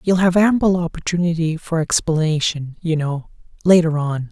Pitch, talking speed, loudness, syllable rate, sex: 165 Hz, 140 wpm, -18 LUFS, 5.0 syllables/s, male